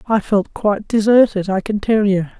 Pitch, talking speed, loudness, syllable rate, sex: 205 Hz, 200 wpm, -16 LUFS, 5.0 syllables/s, female